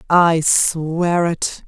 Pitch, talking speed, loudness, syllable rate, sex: 165 Hz, 105 wpm, -16 LUFS, 2.1 syllables/s, female